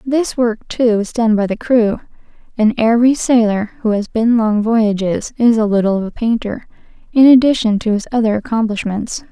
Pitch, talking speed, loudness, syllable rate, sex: 225 Hz, 180 wpm, -15 LUFS, 5.1 syllables/s, female